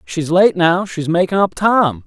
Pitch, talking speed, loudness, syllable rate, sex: 170 Hz, 205 wpm, -15 LUFS, 4.1 syllables/s, male